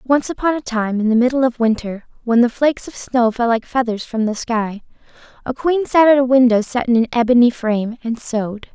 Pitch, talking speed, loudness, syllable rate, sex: 240 Hz, 225 wpm, -17 LUFS, 5.6 syllables/s, female